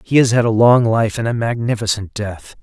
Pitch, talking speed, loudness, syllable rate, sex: 110 Hz, 230 wpm, -16 LUFS, 5.2 syllables/s, male